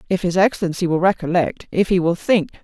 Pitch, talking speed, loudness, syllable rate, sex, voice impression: 180 Hz, 180 wpm, -19 LUFS, 6.1 syllables/s, female, slightly feminine, very adult-like, slightly muffled, fluent, slightly calm, slightly unique